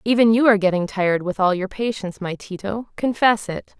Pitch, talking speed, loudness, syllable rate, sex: 205 Hz, 205 wpm, -20 LUFS, 5.8 syllables/s, female